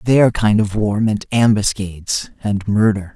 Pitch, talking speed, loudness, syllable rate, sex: 105 Hz, 150 wpm, -17 LUFS, 4.0 syllables/s, male